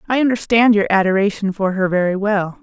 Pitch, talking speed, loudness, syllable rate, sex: 205 Hz, 185 wpm, -16 LUFS, 5.7 syllables/s, female